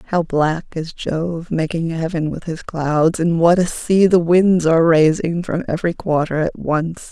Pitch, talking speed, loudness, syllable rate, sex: 165 Hz, 185 wpm, -17 LUFS, 4.3 syllables/s, female